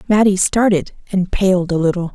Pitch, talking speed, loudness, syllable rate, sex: 190 Hz, 170 wpm, -16 LUFS, 5.0 syllables/s, female